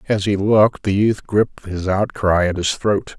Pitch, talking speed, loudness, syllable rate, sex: 100 Hz, 205 wpm, -18 LUFS, 4.7 syllables/s, male